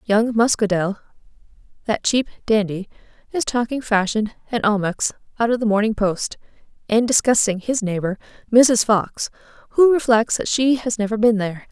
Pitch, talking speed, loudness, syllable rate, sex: 220 Hz, 150 wpm, -19 LUFS, 5.1 syllables/s, female